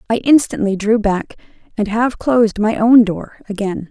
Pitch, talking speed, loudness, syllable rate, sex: 220 Hz, 170 wpm, -15 LUFS, 4.7 syllables/s, female